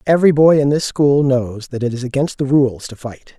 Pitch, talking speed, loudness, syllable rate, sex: 135 Hz, 250 wpm, -15 LUFS, 5.3 syllables/s, male